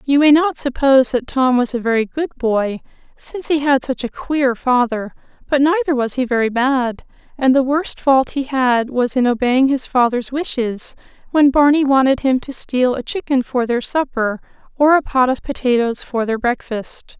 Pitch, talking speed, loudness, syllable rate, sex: 260 Hz, 190 wpm, -17 LUFS, 4.7 syllables/s, female